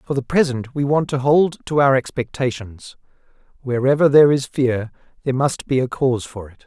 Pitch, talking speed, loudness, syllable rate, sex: 130 Hz, 190 wpm, -18 LUFS, 5.5 syllables/s, male